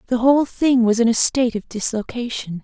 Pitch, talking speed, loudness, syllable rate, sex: 235 Hz, 205 wpm, -18 LUFS, 5.8 syllables/s, female